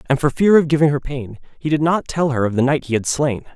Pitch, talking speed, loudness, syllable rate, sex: 140 Hz, 305 wpm, -18 LUFS, 6.1 syllables/s, male